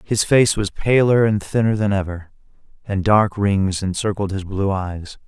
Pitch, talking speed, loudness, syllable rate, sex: 100 Hz, 170 wpm, -19 LUFS, 4.4 syllables/s, male